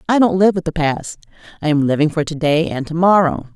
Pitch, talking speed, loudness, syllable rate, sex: 165 Hz, 255 wpm, -16 LUFS, 5.9 syllables/s, female